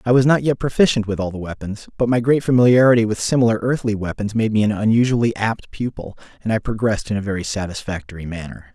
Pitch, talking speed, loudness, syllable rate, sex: 110 Hz, 215 wpm, -19 LUFS, 6.6 syllables/s, male